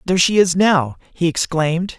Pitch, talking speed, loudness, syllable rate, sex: 175 Hz, 180 wpm, -17 LUFS, 5.2 syllables/s, male